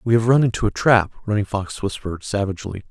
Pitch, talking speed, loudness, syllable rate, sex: 105 Hz, 205 wpm, -20 LUFS, 6.5 syllables/s, male